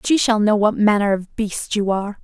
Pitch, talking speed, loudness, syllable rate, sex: 210 Hz, 240 wpm, -18 LUFS, 5.2 syllables/s, female